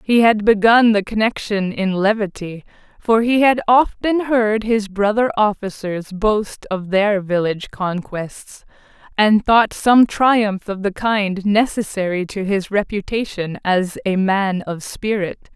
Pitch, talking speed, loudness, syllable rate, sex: 205 Hz, 140 wpm, -17 LUFS, 3.9 syllables/s, female